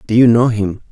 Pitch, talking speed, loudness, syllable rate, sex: 115 Hz, 260 wpm, -13 LUFS, 5.7 syllables/s, male